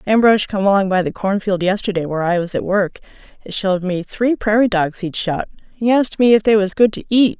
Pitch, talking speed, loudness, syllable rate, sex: 200 Hz, 235 wpm, -17 LUFS, 5.8 syllables/s, female